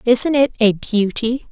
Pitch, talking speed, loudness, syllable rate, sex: 235 Hz, 160 wpm, -17 LUFS, 3.7 syllables/s, female